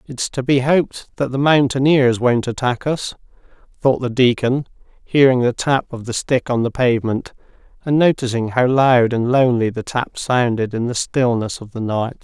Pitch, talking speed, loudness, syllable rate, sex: 125 Hz, 180 wpm, -18 LUFS, 4.8 syllables/s, male